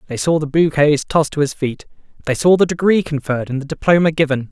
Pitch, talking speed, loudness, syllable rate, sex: 150 Hz, 225 wpm, -16 LUFS, 6.4 syllables/s, male